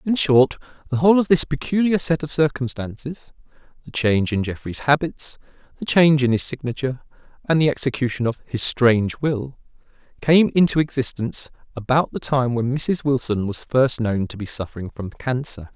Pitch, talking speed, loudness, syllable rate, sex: 135 Hz, 160 wpm, -20 LUFS, 5.4 syllables/s, male